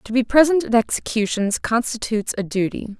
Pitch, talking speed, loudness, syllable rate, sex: 230 Hz, 160 wpm, -20 LUFS, 5.6 syllables/s, female